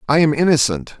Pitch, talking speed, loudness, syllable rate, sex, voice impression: 145 Hz, 180 wpm, -16 LUFS, 6.0 syllables/s, male, very masculine, old, very thick, tensed, very powerful, bright, soft, very clear, fluent, halting, very cool, intellectual, slightly refreshing, sincere, very calm, very mature, friendly, reassuring, very unique, elegant, very wild, sweet, slightly lively, kind, slightly intense